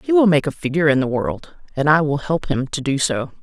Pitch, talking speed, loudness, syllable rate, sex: 150 Hz, 280 wpm, -19 LUFS, 5.8 syllables/s, female